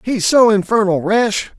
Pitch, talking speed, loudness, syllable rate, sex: 210 Hz, 150 wpm, -14 LUFS, 4.2 syllables/s, male